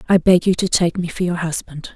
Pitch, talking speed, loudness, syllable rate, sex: 175 Hz, 275 wpm, -18 LUFS, 5.8 syllables/s, female